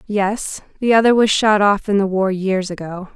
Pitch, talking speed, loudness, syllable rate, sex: 200 Hz, 210 wpm, -17 LUFS, 4.6 syllables/s, female